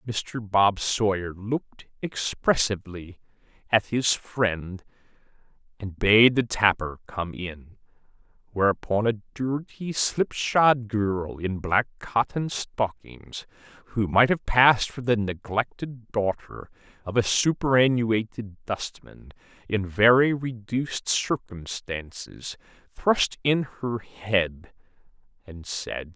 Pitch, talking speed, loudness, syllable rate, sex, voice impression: 110 Hz, 105 wpm, -25 LUFS, 3.4 syllables/s, male, very masculine, middle-aged, thick, tensed, slightly powerful, bright, slightly soft, clear, fluent, slightly cool, very intellectual, refreshing, very sincere, slightly calm, friendly, reassuring, unique, slightly elegant, wild, slightly sweet, lively, kind, slightly intense